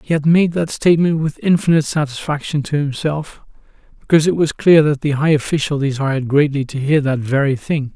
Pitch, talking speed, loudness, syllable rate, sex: 150 Hz, 190 wpm, -16 LUFS, 5.8 syllables/s, male